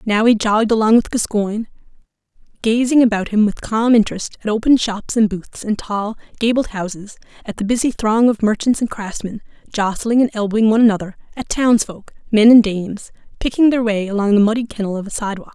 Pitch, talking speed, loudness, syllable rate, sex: 220 Hz, 180 wpm, -17 LUFS, 5.9 syllables/s, female